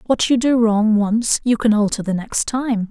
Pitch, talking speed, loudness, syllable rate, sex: 225 Hz, 225 wpm, -17 LUFS, 4.4 syllables/s, female